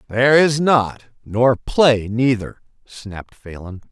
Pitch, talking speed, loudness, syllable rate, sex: 120 Hz, 125 wpm, -16 LUFS, 3.7 syllables/s, male